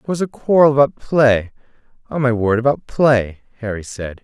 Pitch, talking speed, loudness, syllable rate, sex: 125 Hz, 155 wpm, -16 LUFS, 4.8 syllables/s, male